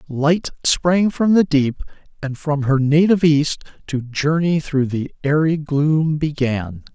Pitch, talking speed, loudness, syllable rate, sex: 150 Hz, 145 wpm, -18 LUFS, 3.8 syllables/s, male